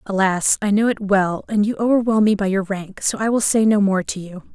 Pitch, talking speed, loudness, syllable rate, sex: 205 Hz, 265 wpm, -18 LUFS, 5.4 syllables/s, female